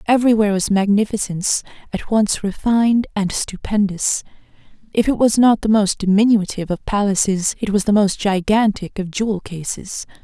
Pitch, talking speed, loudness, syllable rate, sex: 205 Hz, 145 wpm, -18 LUFS, 5.3 syllables/s, female